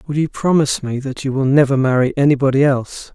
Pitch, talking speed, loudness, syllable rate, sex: 135 Hz, 210 wpm, -16 LUFS, 6.4 syllables/s, male